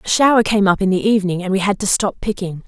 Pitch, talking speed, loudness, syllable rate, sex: 195 Hz, 290 wpm, -16 LUFS, 6.7 syllables/s, female